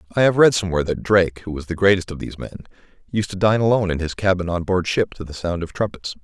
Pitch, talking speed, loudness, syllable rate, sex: 95 Hz, 270 wpm, -20 LUFS, 7.0 syllables/s, male